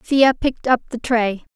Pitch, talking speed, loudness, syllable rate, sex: 245 Hz, 195 wpm, -19 LUFS, 4.9 syllables/s, female